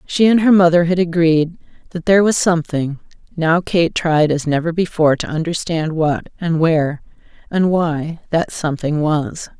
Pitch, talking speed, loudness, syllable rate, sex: 165 Hz, 165 wpm, -16 LUFS, 4.8 syllables/s, female